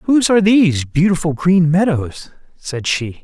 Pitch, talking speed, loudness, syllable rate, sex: 170 Hz, 150 wpm, -15 LUFS, 4.8 syllables/s, male